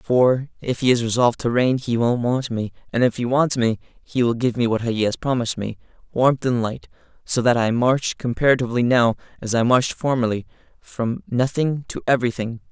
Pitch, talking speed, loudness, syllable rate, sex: 120 Hz, 190 wpm, -21 LUFS, 5.4 syllables/s, male